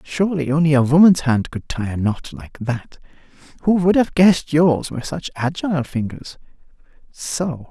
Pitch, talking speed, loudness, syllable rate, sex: 150 Hz, 150 wpm, -18 LUFS, 4.9 syllables/s, male